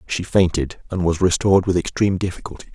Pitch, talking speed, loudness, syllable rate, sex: 90 Hz, 175 wpm, -19 LUFS, 6.4 syllables/s, male